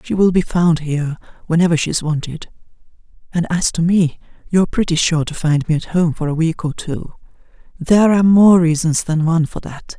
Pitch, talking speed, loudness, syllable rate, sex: 165 Hz, 200 wpm, -16 LUFS, 5.5 syllables/s, male